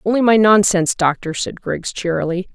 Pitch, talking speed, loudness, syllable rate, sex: 190 Hz, 165 wpm, -17 LUFS, 5.4 syllables/s, female